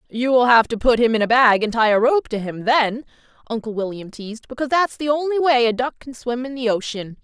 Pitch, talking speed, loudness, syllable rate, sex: 240 Hz, 255 wpm, -19 LUFS, 5.7 syllables/s, female